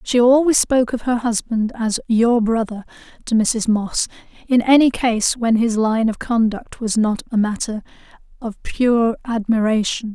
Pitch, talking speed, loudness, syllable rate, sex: 230 Hz, 155 wpm, -18 LUFS, 4.2 syllables/s, female